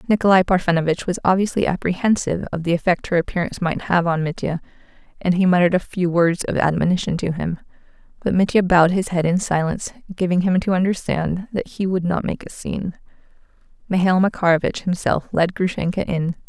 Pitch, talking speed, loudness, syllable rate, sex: 180 Hz, 175 wpm, -20 LUFS, 6.1 syllables/s, female